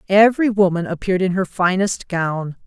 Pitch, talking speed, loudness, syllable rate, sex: 185 Hz, 160 wpm, -18 LUFS, 5.4 syllables/s, female